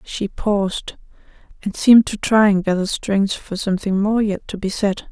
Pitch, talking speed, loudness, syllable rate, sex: 200 Hz, 190 wpm, -18 LUFS, 4.8 syllables/s, female